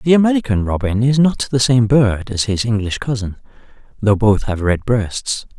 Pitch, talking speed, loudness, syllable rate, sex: 115 Hz, 185 wpm, -16 LUFS, 4.8 syllables/s, male